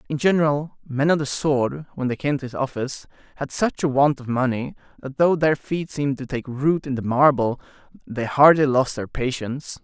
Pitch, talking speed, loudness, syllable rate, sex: 140 Hz, 205 wpm, -21 LUFS, 5.2 syllables/s, male